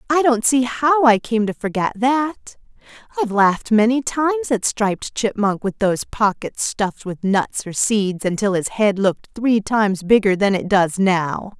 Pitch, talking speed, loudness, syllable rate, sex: 215 Hz, 180 wpm, -18 LUFS, 4.7 syllables/s, female